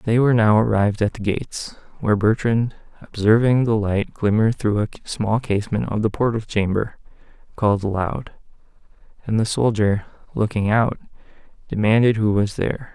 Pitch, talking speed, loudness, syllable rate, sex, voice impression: 110 Hz, 150 wpm, -20 LUFS, 5.2 syllables/s, male, very masculine, middle-aged, very thick, slightly relaxed, weak, very dark, very soft, very muffled, slightly fluent, raspy, slightly cool, intellectual, slightly refreshing, sincere, very calm, slightly friendly, slightly reassuring, very unique, elegant, slightly wild, sweet, lively, kind, slightly modest